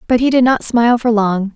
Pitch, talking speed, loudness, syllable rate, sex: 230 Hz, 270 wpm, -13 LUFS, 5.8 syllables/s, female